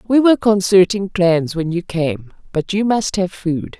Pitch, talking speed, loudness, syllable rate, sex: 190 Hz, 190 wpm, -17 LUFS, 4.3 syllables/s, female